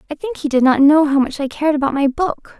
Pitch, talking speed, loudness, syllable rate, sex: 290 Hz, 300 wpm, -16 LUFS, 6.3 syllables/s, female